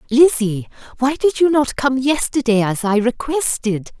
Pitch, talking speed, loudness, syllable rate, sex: 250 Hz, 150 wpm, -17 LUFS, 4.4 syllables/s, female